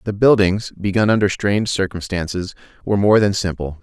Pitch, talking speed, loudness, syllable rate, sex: 95 Hz, 155 wpm, -18 LUFS, 5.9 syllables/s, male